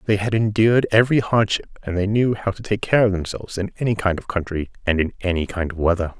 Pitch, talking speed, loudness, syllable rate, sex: 100 Hz, 240 wpm, -20 LUFS, 6.5 syllables/s, male